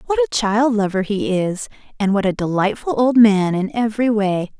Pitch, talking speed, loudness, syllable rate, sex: 215 Hz, 195 wpm, -18 LUFS, 4.9 syllables/s, female